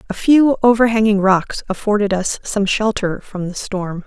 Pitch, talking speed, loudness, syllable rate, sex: 205 Hz, 160 wpm, -16 LUFS, 4.6 syllables/s, female